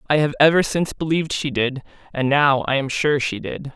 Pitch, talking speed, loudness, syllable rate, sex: 145 Hz, 225 wpm, -20 LUFS, 5.6 syllables/s, female